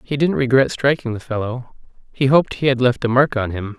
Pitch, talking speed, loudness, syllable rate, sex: 125 Hz, 220 wpm, -18 LUFS, 5.7 syllables/s, male